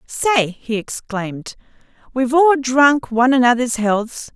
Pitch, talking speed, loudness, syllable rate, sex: 250 Hz, 125 wpm, -16 LUFS, 4.1 syllables/s, female